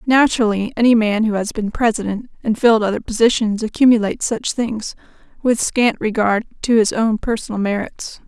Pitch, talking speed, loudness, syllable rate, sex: 220 Hz, 160 wpm, -17 LUFS, 5.4 syllables/s, female